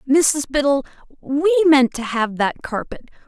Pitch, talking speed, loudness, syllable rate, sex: 280 Hz, 145 wpm, -18 LUFS, 4.0 syllables/s, female